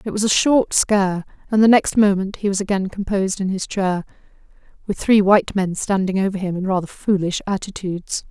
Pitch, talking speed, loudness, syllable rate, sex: 195 Hz, 195 wpm, -19 LUFS, 5.6 syllables/s, female